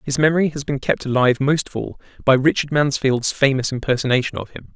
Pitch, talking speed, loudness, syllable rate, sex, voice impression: 135 Hz, 200 wpm, -19 LUFS, 6.1 syllables/s, male, very masculine, adult-like, slightly thick, very tensed, powerful, bright, slightly hard, clear, very fluent, slightly raspy, cool, intellectual, very refreshing, slightly sincere, slightly calm, slightly mature, friendly, reassuring, very unique, elegant, slightly wild, sweet, lively, kind, slightly intense, slightly sharp